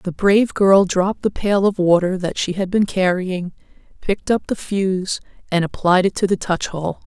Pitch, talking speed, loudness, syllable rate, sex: 190 Hz, 200 wpm, -18 LUFS, 4.8 syllables/s, female